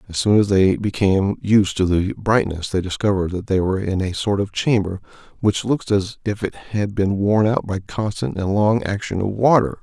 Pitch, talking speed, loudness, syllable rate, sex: 100 Hz, 215 wpm, -20 LUFS, 5.2 syllables/s, male